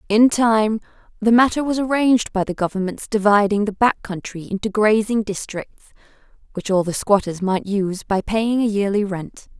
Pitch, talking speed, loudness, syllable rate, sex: 210 Hz, 170 wpm, -19 LUFS, 5.0 syllables/s, female